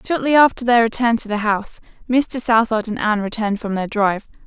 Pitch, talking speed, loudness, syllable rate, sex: 225 Hz, 200 wpm, -18 LUFS, 6.2 syllables/s, female